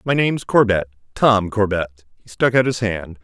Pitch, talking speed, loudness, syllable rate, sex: 105 Hz, 165 wpm, -18 LUFS, 5.1 syllables/s, male